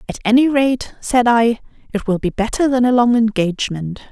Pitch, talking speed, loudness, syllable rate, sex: 230 Hz, 190 wpm, -16 LUFS, 5.5 syllables/s, female